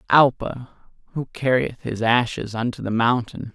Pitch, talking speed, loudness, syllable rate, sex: 120 Hz, 135 wpm, -22 LUFS, 4.6 syllables/s, male